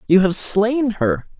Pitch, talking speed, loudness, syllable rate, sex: 210 Hz, 170 wpm, -17 LUFS, 3.6 syllables/s, female